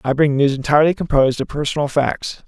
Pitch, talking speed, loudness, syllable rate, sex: 145 Hz, 195 wpm, -17 LUFS, 6.3 syllables/s, male